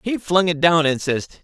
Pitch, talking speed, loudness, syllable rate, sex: 165 Hz, 250 wpm, -18 LUFS, 5.0 syllables/s, male